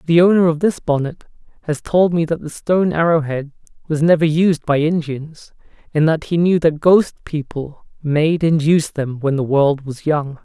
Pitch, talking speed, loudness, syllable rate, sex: 155 Hz, 195 wpm, -17 LUFS, 4.6 syllables/s, male